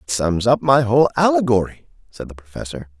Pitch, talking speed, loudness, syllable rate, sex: 105 Hz, 180 wpm, -16 LUFS, 5.9 syllables/s, male